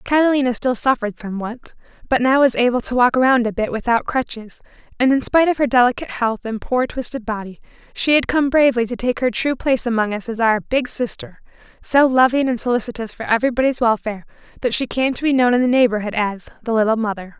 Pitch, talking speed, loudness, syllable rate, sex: 240 Hz, 210 wpm, -18 LUFS, 6.4 syllables/s, female